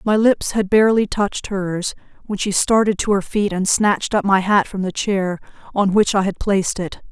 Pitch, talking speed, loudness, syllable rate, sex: 200 Hz, 220 wpm, -18 LUFS, 5.1 syllables/s, female